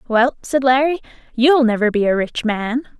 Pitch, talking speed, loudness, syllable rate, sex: 245 Hz, 180 wpm, -17 LUFS, 4.7 syllables/s, female